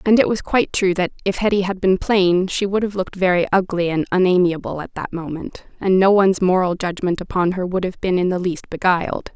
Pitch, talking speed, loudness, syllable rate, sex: 185 Hz, 230 wpm, -19 LUFS, 5.8 syllables/s, female